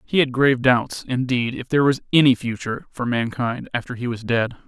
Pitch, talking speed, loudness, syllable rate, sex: 125 Hz, 205 wpm, -21 LUFS, 5.7 syllables/s, male